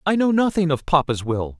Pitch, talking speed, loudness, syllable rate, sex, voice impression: 160 Hz, 225 wpm, -20 LUFS, 5.4 syllables/s, male, masculine, adult-like, thick, tensed, soft, fluent, cool, intellectual, sincere, slightly friendly, wild, kind, slightly modest